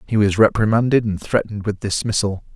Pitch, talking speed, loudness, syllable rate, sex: 105 Hz, 165 wpm, -19 LUFS, 6.1 syllables/s, male